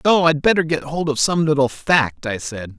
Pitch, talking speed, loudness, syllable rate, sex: 150 Hz, 235 wpm, -18 LUFS, 4.8 syllables/s, male